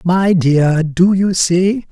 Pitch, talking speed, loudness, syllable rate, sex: 180 Hz, 155 wpm, -13 LUFS, 2.8 syllables/s, male